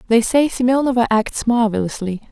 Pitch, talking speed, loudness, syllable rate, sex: 235 Hz, 130 wpm, -17 LUFS, 5.5 syllables/s, female